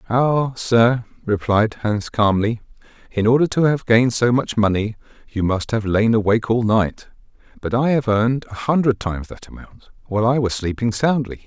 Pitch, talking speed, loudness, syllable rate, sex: 115 Hz, 180 wpm, -19 LUFS, 5.0 syllables/s, male